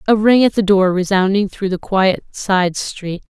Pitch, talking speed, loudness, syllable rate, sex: 195 Hz, 200 wpm, -16 LUFS, 4.3 syllables/s, female